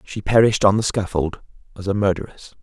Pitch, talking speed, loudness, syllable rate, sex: 100 Hz, 185 wpm, -19 LUFS, 6.1 syllables/s, male